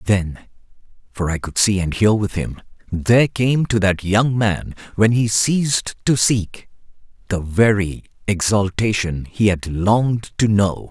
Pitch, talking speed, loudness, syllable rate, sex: 105 Hz, 145 wpm, -18 LUFS, 4.0 syllables/s, male